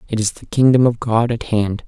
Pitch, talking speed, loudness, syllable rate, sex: 115 Hz, 255 wpm, -17 LUFS, 5.3 syllables/s, male